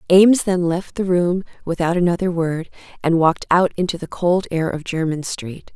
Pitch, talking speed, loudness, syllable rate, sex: 175 Hz, 190 wpm, -19 LUFS, 5.2 syllables/s, female